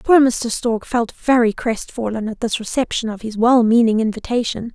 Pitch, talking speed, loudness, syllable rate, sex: 230 Hz, 175 wpm, -18 LUFS, 5.0 syllables/s, female